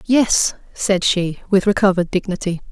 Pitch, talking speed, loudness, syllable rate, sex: 190 Hz, 135 wpm, -18 LUFS, 4.9 syllables/s, female